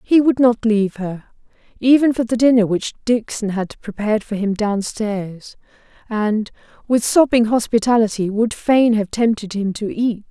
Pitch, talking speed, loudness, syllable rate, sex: 220 Hz, 165 wpm, -18 LUFS, 4.7 syllables/s, female